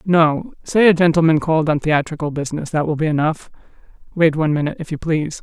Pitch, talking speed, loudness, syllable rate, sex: 155 Hz, 190 wpm, -17 LUFS, 6.6 syllables/s, female